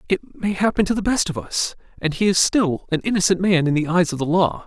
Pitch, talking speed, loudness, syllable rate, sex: 175 Hz, 270 wpm, -20 LUFS, 5.8 syllables/s, male